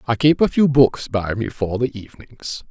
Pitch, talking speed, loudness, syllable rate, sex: 120 Hz, 220 wpm, -19 LUFS, 4.8 syllables/s, male